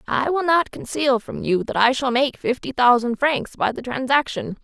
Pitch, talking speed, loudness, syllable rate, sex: 255 Hz, 205 wpm, -20 LUFS, 4.7 syllables/s, female